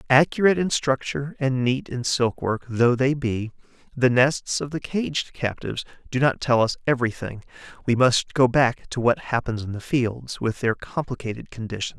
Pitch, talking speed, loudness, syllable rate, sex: 125 Hz, 180 wpm, -23 LUFS, 4.9 syllables/s, male